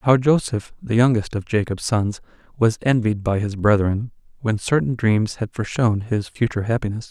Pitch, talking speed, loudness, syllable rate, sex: 110 Hz, 170 wpm, -21 LUFS, 5.1 syllables/s, male